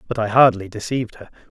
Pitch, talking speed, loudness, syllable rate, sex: 110 Hz, 190 wpm, -18 LUFS, 6.9 syllables/s, male